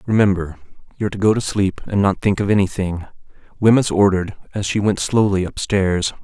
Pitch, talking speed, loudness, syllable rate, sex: 100 Hz, 175 wpm, -18 LUFS, 5.6 syllables/s, male